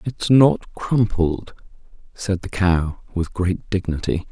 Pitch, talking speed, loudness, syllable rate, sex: 95 Hz, 125 wpm, -20 LUFS, 3.3 syllables/s, male